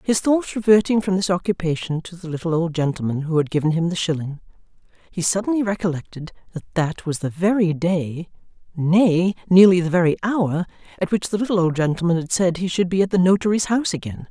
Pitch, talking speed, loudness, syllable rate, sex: 180 Hz, 190 wpm, -20 LUFS, 5.9 syllables/s, female